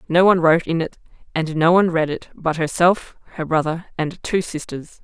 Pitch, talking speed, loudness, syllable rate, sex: 165 Hz, 205 wpm, -19 LUFS, 5.5 syllables/s, female